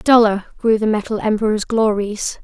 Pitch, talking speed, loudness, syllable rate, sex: 215 Hz, 150 wpm, -17 LUFS, 4.7 syllables/s, female